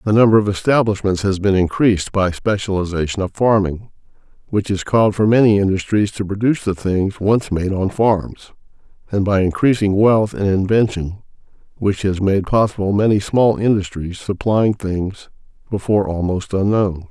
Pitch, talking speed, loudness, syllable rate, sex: 100 Hz, 150 wpm, -17 LUFS, 5.1 syllables/s, male